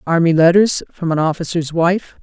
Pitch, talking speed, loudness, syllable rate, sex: 170 Hz, 160 wpm, -15 LUFS, 5.0 syllables/s, female